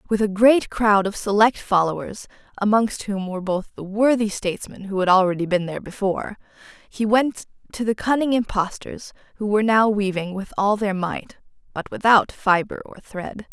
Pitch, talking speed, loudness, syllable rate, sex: 205 Hz, 175 wpm, -21 LUFS, 5.1 syllables/s, female